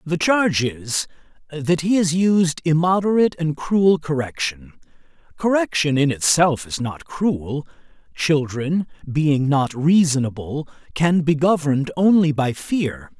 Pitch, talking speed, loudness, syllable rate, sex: 155 Hz, 125 wpm, -19 LUFS, 4.0 syllables/s, male